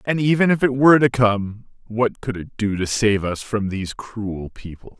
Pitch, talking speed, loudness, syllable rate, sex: 115 Hz, 215 wpm, -20 LUFS, 4.7 syllables/s, male